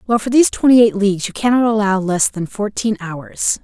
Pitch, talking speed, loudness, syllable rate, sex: 210 Hz, 215 wpm, -15 LUFS, 5.5 syllables/s, female